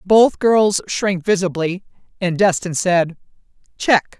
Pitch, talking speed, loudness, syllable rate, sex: 190 Hz, 115 wpm, -17 LUFS, 3.6 syllables/s, female